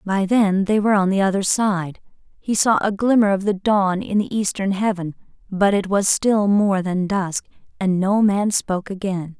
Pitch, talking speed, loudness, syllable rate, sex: 195 Hz, 200 wpm, -19 LUFS, 4.6 syllables/s, female